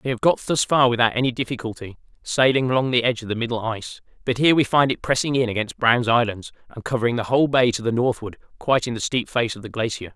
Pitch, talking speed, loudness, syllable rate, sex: 120 Hz, 250 wpm, -21 LUFS, 6.9 syllables/s, male